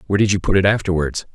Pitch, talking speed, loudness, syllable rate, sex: 95 Hz, 270 wpm, -18 LUFS, 7.9 syllables/s, male